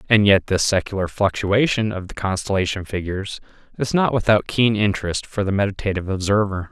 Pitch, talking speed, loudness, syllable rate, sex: 100 Hz, 160 wpm, -20 LUFS, 5.8 syllables/s, male